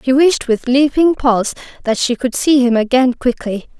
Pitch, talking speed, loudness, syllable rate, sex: 255 Hz, 190 wpm, -15 LUFS, 4.9 syllables/s, female